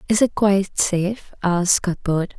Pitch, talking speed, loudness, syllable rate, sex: 190 Hz, 150 wpm, -20 LUFS, 4.8 syllables/s, female